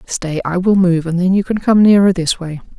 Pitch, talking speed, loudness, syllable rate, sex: 180 Hz, 260 wpm, -14 LUFS, 5.2 syllables/s, female